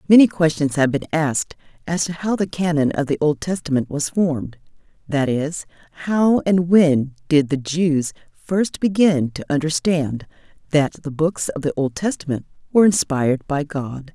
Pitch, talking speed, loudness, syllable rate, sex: 155 Hz, 160 wpm, -20 LUFS, 4.6 syllables/s, female